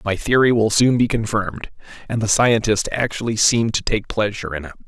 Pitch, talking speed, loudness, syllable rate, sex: 110 Hz, 195 wpm, -18 LUFS, 5.9 syllables/s, male